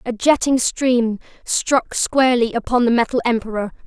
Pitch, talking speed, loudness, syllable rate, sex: 240 Hz, 140 wpm, -18 LUFS, 4.7 syllables/s, female